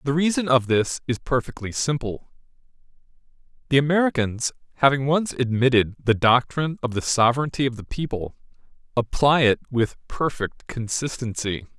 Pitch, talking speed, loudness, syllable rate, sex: 125 Hz, 125 wpm, -22 LUFS, 5.2 syllables/s, male